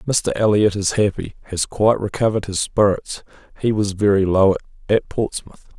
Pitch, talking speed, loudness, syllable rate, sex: 100 Hz, 155 wpm, -19 LUFS, 5.1 syllables/s, male